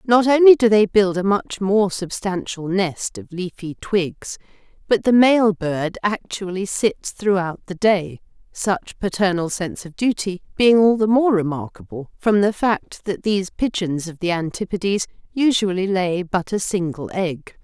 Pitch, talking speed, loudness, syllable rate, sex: 190 Hz, 160 wpm, -20 LUFS, 4.3 syllables/s, female